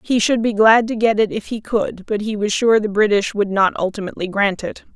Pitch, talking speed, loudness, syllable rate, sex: 210 Hz, 255 wpm, -18 LUFS, 5.5 syllables/s, female